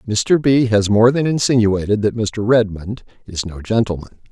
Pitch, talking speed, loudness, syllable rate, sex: 110 Hz, 165 wpm, -16 LUFS, 4.7 syllables/s, male